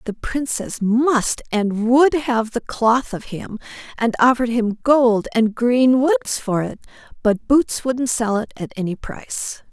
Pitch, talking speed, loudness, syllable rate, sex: 240 Hz, 165 wpm, -19 LUFS, 3.8 syllables/s, female